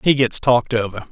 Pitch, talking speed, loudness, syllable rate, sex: 120 Hz, 215 wpm, -17 LUFS, 5.9 syllables/s, male